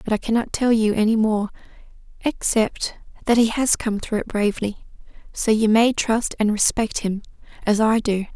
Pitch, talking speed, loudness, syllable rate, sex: 220 Hz, 170 wpm, -21 LUFS, 5.0 syllables/s, female